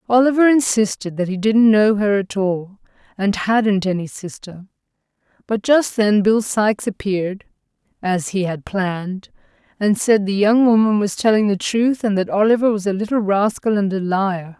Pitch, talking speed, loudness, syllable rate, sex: 205 Hz, 175 wpm, -18 LUFS, 4.7 syllables/s, female